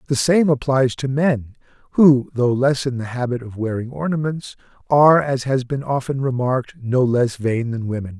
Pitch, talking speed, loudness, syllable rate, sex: 130 Hz, 185 wpm, -19 LUFS, 4.9 syllables/s, male